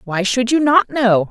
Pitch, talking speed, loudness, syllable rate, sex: 235 Hz, 230 wpm, -15 LUFS, 4.2 syllables/s, female